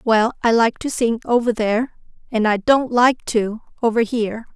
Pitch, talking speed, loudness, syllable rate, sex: 230 Hz, 185 wpm, -19 LUFS, 4.8 syllables/s, female